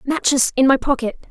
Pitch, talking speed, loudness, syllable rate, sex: 265 Hz, 185 wpm, -17 LUFS, 5.3 syllables/s, female